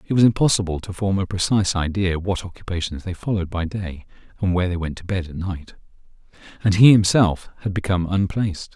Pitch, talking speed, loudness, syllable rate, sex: 95 Hz, 190 wpm, -21 LUFS, 6.2 syllables/s, male